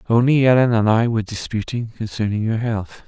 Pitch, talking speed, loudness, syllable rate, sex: 110 Hz, 175 wpm, -19 LUFS, 5.6 syllables/s, male